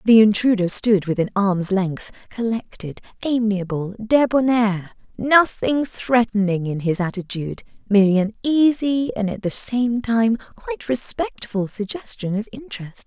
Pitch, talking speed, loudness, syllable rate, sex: 220 Hz, 125 wpm, -20 LUFS, 4.5 syllables/s, female